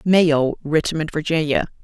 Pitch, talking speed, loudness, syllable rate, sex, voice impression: 155 Hz, 100 wpm, -19 LUFS, 3.7 syllables/s, female, feminine, adult-like, clear, slightly fluent, slightly refreshing, sincere